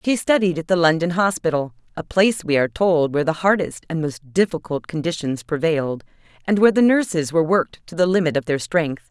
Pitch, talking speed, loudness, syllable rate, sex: 165 Hz, 200 wpm, -20 LUFS, 6.1 syllables/s, female